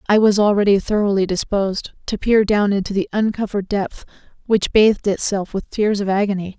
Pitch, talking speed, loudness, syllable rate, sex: 200 Hz, 175 wpm, -18 LUFS, 5.7 syllables/s, female